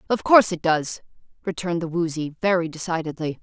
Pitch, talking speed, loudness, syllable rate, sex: 170 Hz, 160 wpm, -22 LUFS, 6.2 syllables/s, female